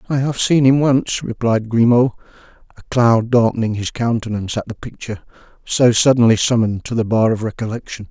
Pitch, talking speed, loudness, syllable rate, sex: 115 Hz, 170 wpm, -16 LUFS, 5.8 syllables/s, male